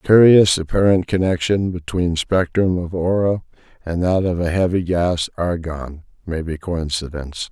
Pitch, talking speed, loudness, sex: 90 Hz, 135 wpm, -19 LUFS, male